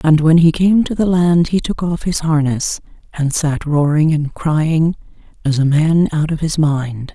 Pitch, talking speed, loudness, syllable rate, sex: 160 Hz, 200 wpm, -15 LUFS, 4.2 syllables/s, female